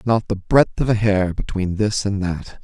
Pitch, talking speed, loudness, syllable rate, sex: 100 Hz, 230 wpm, -20 LUFS, 4.4 syllables/s, male